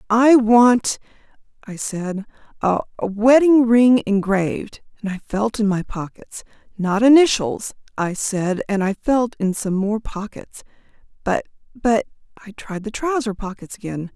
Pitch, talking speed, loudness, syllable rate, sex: 215 Hz, 135 wpm, -19 LUFS, 4.1 syllables/s, female